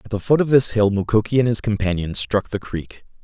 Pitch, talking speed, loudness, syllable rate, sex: 110 Hz, 240 wpm, -19 LUFS, 5.7 syllables/s, male